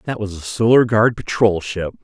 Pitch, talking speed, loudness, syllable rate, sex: 105 Hz, 205 wpm, -17 LUFS, 5.1 syllables/s, male